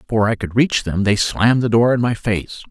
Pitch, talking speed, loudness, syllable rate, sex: 110 Hz, 265 wpm, -17 LUFS, 6.0 syllables/s, male